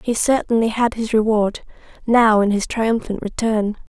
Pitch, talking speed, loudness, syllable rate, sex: 220 Hz, 135 wpm, -18 LUFS, 4.6 syllables/s, female